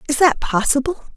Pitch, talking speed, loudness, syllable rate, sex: 285 Hz, 155 wpm, -18 LUFS, 5.7 syllables/s, female